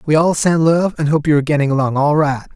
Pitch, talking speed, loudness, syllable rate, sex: 150 Hz, 280 wpm, -15 LUFS, 6.4 syllables/s, male